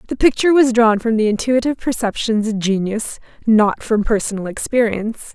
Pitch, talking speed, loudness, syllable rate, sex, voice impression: 225 Hz, 155 wpm, -17 LUFS, 5.5 syllables/s, female, feminine, slightly adult-like, slightly bright, slightly fluent, slightly intellectual, slightly lively